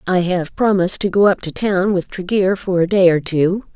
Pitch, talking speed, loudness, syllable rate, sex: 185 Hz, 240 wpm, -16 LUFS, 5.1 syllables/s, female